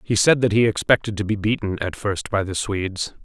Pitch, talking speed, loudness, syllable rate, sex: 105 Hz, 240 wpm, -21 LUFS, 5.5 syllables/s, male